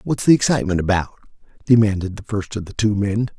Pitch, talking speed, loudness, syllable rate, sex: 105 Hz, 195 wpm, -19 LUFS, 6.3 syllables/s, male